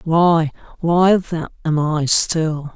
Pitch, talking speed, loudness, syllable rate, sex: 160 Hz, 130 wpm, -17 LUFS, 2.8 syllables/s, male